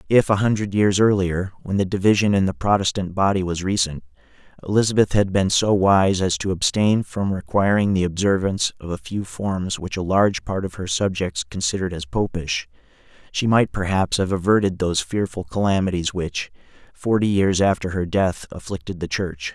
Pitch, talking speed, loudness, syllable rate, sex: 95 Hz, 175 wpm, -21 LUFS, 5.3 syllables/s, male